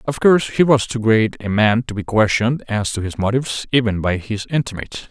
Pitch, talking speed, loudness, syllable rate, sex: 115 Hz, 225 wpm, -18 LUFS, 5.8 syllables/s, male